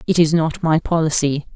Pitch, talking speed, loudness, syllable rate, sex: 160 Hz, 195 wpm, -17 LUFS, 5.2 syllables/s, female